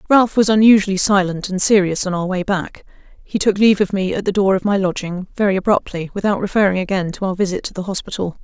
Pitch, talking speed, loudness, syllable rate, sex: 195 Hz, 230 wpm, -17 LUFS, 6.4 syllables/s, female